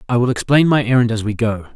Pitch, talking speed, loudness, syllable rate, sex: 120 Hz, 275 wpm, -16 LUFS, 6.6 syllables/s, male